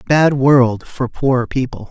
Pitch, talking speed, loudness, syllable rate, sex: 130 Hz, 160 wpm, -15 LUFS, 3.4 syllables/s, male